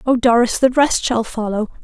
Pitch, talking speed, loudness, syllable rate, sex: 240 Hz, 195 wpm, -16 LUFS, 5.0 syllables/s, female